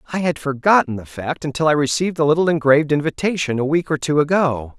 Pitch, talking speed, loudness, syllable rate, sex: 150 Hz, 215 wpm, -18 LUFS, 6.4 syllables/s, male